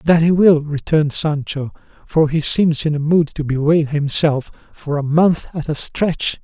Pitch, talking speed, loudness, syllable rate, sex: 155 Hz, 185 wpm, -17 LUFS, 4.4 syllables/s, male